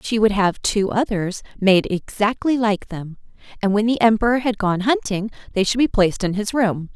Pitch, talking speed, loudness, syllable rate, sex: 210 Hz, 200 wpm, -19 LUFS, 5.0 syllables/s, female